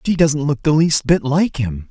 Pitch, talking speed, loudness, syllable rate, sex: 150 Hz, 250 wpm, -16 LUFS, 4.5 syllables/s, male